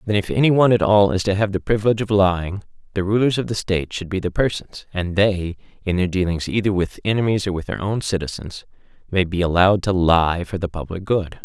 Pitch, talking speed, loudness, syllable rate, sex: 95 Hz, 230 wpm, -20 LUFS, 6.1 syllables/s, male